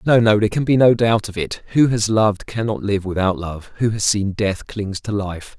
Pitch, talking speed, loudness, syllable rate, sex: 105 Hz, 260 wpm, -19 LUFS, 5.1 syllables/s, male